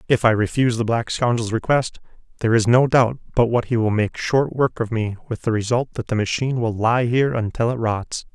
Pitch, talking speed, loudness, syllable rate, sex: 115 Hz, 230 wpm, -20 LUFS, 5.7 syllables/s, male